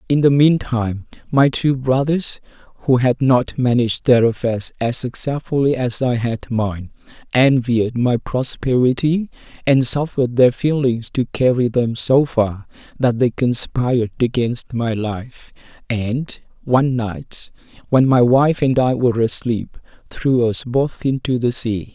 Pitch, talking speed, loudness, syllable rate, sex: 125 Hz, 145 wpm, -18 LUFS, 4.0 syllables/s, male